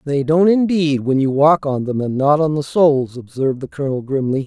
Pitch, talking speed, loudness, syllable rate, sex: 145 Hz, 230 wpm, -17 LUFS, 5.5 syllables/s, male